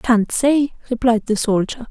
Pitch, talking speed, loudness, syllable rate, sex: 235 Hz, 160 wpm, -18 LUFS, 4.1 syllables/s, female